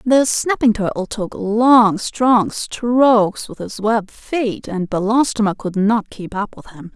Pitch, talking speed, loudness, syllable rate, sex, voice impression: 220 Hz, 165 wpm, -17 LUFS, 3.8 syllables/s, female, very feminine, adult-like, slightly refreshing, friendly, slightly lively